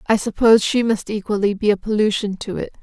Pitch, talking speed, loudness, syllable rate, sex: 210 Hz, 210 wpm, -18 LUFS, 6.1 syllables/s, female